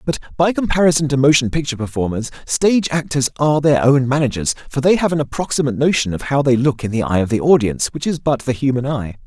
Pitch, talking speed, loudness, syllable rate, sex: 135 Hz, 225 wpm, -17 LUFS, 6.6 syllables/s, male